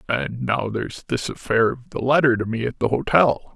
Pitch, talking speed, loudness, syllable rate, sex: 120 Hz, 220 wpm, -21 LUFS, 5.1 syllables/s, male